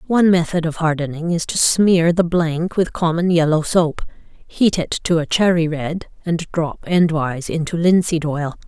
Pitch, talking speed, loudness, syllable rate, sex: 165 Hz, 175 wpm, -18 LUFS, 4.5 syllables/s, female